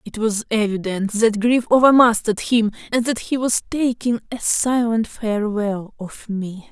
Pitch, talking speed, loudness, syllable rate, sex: 225 Hz, 160 wpm, -19 LUFS, 4.5 syllables/s, female